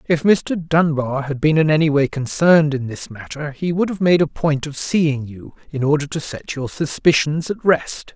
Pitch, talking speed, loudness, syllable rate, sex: 150 Hz, 215 wpm, -18 LUFS, 4.7 syllables/s, male